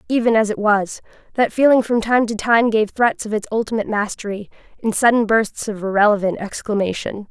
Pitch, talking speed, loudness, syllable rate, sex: 215 Hz, 180 wpm, -18 LUFS, 5.6 syllables/s, female